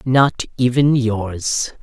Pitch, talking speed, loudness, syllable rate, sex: 120 Hz, 100 wpm, -17 LUFS, 2.7 syllables/s, female